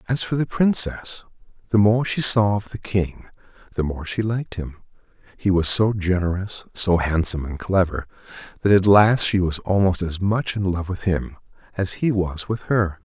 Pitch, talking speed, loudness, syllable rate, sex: 95 Hz, 190 wpm, -21 LUFS, 4.8 syllables/s, male